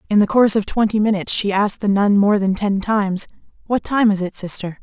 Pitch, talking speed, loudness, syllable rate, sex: 205 Hz, 235 wpm, -17 LUFS, 6.2 syllables/s, female